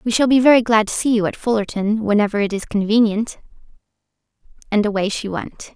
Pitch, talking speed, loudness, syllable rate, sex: 215 Hz, 190 wpm, -18 LUFS, 6.0 syllables/s, female